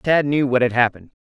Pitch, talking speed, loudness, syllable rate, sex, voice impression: 130 Hz, 240 wpm, -18 LUFS, 6.4 syllables/s, male, very masculine, adult-like, slightly middle-aged, thick, tensed, slightly powerful, bright, hard, very soft, slightly muffled, fluent, slightly raspy, cool, very intellectual, slightly refreshing, very sincere, very calm, mature, very friendly, very reassuring, unique, elegant, slightly wild, sweet, slightly lively, very kind, modest